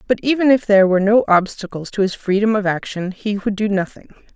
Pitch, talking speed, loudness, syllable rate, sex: 205 Hz, 220 wpm, -17 LUFS, 6.0 syllables/s, female